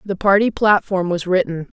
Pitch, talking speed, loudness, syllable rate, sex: 190 Hz, 170 wpm, -17 LUFS, 4.9 syllables/s, female